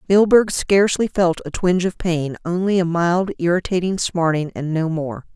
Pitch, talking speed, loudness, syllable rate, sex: 175 Hz, 170 wpm, -19 LUFS, 4.9 syllables/s, female